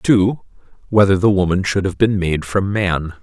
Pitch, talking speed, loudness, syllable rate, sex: 95 Hz, 185 wpm, -17 LUFS, 5.3 syllables/s, male